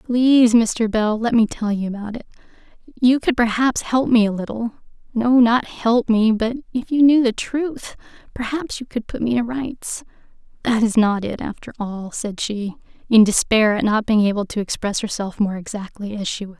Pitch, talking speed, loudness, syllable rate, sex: 225 Hz, 190 wpm, -19 LUFS, 4.9 syllables/s, female